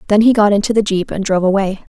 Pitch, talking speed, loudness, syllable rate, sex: 205 Hz, 275 wpm, -14 LUFS, 7.2 syllables/s, female